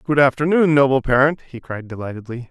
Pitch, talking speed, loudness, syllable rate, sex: 135 Hz, 170 wpm, -17 LUFS, 5.9 syllables/s, male